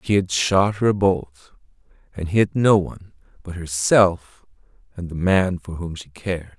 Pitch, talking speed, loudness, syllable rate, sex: 90 Hz, 165 wpm, -20 LUFS, 4.1 syllables/s, male